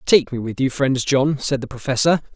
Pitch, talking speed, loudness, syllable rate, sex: 135 Hz, 230 wpm, -19 LUFS, 5.2 syllables/s, male